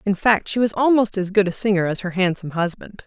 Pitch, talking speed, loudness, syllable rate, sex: 200 Hz, 255 wpm, -20 LUFS, 6.1 syllables/s, female